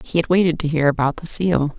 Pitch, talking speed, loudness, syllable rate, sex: 160 Hz, 270 wpm, -18 LUFS, 6.0 syllables/s, female